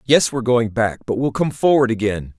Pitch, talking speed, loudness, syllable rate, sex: 120 Hz, 225 wpm, -18 LUFS, 5.6 syllables/s, male